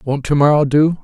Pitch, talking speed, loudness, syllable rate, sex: 145 Hz, 175 wpm, -14 LUFS, 5.5 syllables/s, male